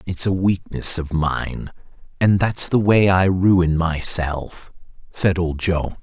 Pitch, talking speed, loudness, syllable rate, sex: 90 Hz, 150 wpm, -19 LUFS, 3.4 syllables/s, male